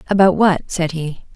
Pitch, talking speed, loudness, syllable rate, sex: 175 Hz, 180 wpm, -17 LUFS, 4.9 syllables/s, female